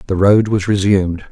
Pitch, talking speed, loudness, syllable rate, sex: 100 Hz, 185 wpm, -14 LUFS, 5.5 syllables/s, male